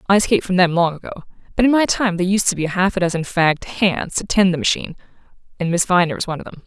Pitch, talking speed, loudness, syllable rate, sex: 185 Hz, 270 wpm, -18 LUFS, 7.4 syllables/s, female